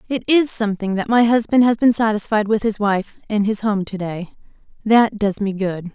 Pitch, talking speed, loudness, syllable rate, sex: 210 Hz, 210 wpm, -18 LUFS, 5.1 syllables/s, female